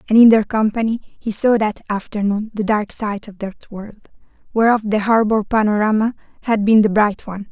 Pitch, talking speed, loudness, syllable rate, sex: 215 Hz, 185 wpm, -17 LUFS, 5.2 syllables/s, female